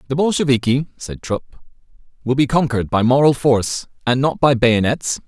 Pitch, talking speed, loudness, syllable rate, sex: 130 Hz, 160 wpm, -17 LUFS, 5.6 syllables/s, male